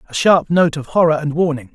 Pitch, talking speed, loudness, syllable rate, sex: 155 Hz, 240 wpm, -16 LUFS, 5.7 syllables/s, male